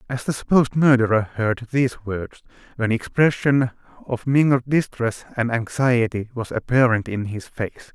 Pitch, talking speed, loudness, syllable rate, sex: 120 Hz, 145 wpm, -21 LUFS, 4.8 syllables/s, male